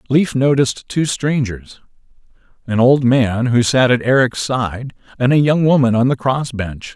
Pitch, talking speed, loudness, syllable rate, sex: 125 Hz, 175 wpm, -16 LUFS, 4.4 syllables/s, male